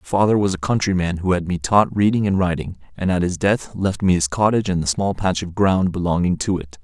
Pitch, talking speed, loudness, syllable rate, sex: 95 Hz, 255 wpm, -19 LUFS, 6.0 syllables/s, male